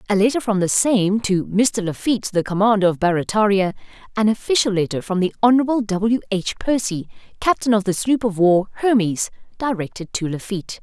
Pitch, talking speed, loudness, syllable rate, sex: 205 Hz, 170 wpm, -19 LUFS, 5.6 syllables/s, female